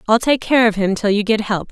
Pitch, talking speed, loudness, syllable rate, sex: 215 Hz, 315 wpm, -16 LUFS, 5.7 syllables/s, female